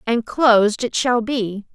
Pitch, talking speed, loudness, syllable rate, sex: 230 Hz, 170 wpm, -18 LUFS, 3.9 syllables/s, female